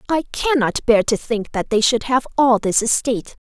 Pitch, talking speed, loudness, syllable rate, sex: 240 Hz, 205 wpm, -18 LUFS, 4.8 syllables/s, female